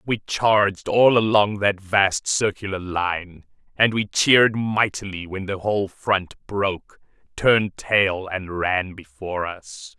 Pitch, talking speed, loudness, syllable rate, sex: 100 Hz, 140 wpm, -21 LUFS, 3.8 syllables/s, male